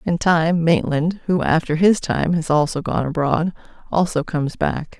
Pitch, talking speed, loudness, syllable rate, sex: 165 Hz, 170 wpm, -19 LUFS, 4.5 syllables/s, female